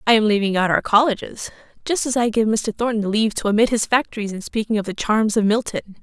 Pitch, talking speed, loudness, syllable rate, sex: 220 Hz, 240 wpm, -19 LUFS, 6.2 syllables/s, female